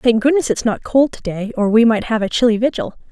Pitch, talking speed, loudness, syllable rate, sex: 230 Hz, 270 wpm, -16 LUFS, 5.8 syllables/s, female